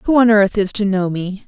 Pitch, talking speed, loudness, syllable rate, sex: 205 Hz, 285 wpm, -16 LUFS, 4.9 syllables/s, female